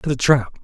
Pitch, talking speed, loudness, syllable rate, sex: 130 Hz, 285 wpm, -17 LUFS, 5.4 syllables/s, male